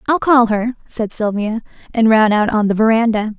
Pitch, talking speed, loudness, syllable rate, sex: 225 Hz, 195 wpm, -15 LUFS, 5.0 syllables/s, female